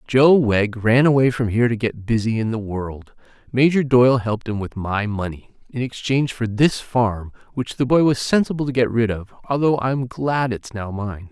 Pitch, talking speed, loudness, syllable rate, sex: 120 Hz, 200 wpm, -20 LUFS, 5.0 syllables/s, male